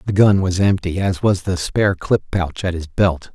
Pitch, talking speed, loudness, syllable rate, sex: 90 Hz, 235 wpm, -18 LUFS, 4.8 syllables/s, male